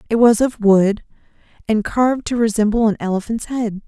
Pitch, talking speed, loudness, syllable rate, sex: 220 Hz, 170 wpm, -17 LUFS, 5.4 syllables/s, female